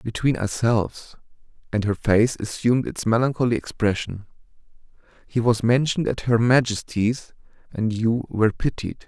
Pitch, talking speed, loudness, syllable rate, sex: 115 Hz, 125 wpm, -22 LUFS, 3.4 syllables/s, male